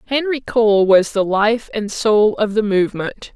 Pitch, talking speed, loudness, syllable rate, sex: 215 Hz, 180 wpm, -16 LUFS, 4.2 syllables/s, female